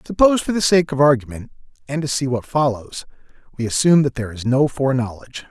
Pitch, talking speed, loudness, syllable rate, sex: 135 Hz, 195 wpm, -18 LUFS, 6.6 syllables/s, male